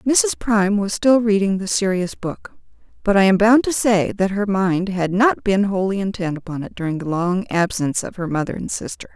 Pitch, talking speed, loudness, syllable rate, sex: 195 Hz, 215 wpm, -19 LUFS, 5.2 syllables/s, female